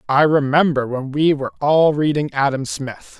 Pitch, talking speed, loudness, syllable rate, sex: 145 Hz, 170 wpm, -18 LUFS, 4.8 syllables/s, male